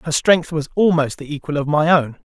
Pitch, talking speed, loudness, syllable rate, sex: 155 Hz, 235 wpm, -18 LUFS, 5.4 syllables/s, male